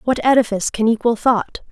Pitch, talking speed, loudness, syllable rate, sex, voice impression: 230 Hz, 175 wpm, -17 LUFS, 6.0 syllables/s, female, very feminine, slightly young, very thin, tensed, slightly weak, slightly bright, slightly soft, very clear, fluent, very cute, intellectual, very refreshing, sincere, calm, very friendly, very reassuring, very unique, very elegant, very sweet, lively, very kind, slightly sharp, slightly modest, light